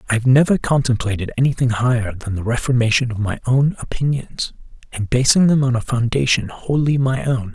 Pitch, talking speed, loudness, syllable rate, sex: 125 Hz, 175 wpm, -18 LUFS, 5.6 syllables/s, male